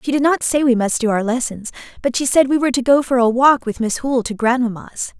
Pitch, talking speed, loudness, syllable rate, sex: 250 Hz, 275 wpm, -17 LUFS, 6.1 syllables/s, female